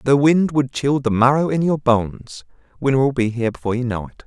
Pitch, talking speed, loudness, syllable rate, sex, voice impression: 130 Hz, 225 wpm, -18 LUFS, 5.8 syllables/s, male, masculine, adult-like, slightly middle-aged, slightly thick, slightly tensed, slightly powerful, bright, slightly hard, clear, fluent, cool, intellectual, slightly refreshing, sincere, calm, slightly friendly, reassuring, slightly wild, slightly sweet, kind